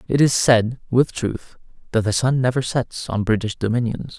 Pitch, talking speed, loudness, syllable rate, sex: 120 Hz, 185 wpm, -20 LUFS, 4.8 syllables/s, male